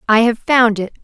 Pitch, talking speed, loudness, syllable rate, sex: 230 Hz, 230 wpm, -14 LUFS, 5.1 syllables/s, female